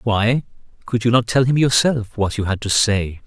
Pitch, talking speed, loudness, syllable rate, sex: 115 Hz, 240 wpm, -18 LUFS, 5.3 syllables/s, male